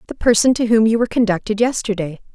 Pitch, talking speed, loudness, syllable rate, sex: 220 Hz, 205 wpm, -17 LUFS, 6.8 syllables/s, female